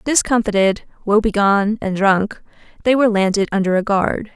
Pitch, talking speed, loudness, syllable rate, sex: 205 Hz, 140 wpm, -17 LUFS, 5.3 syllables/s, female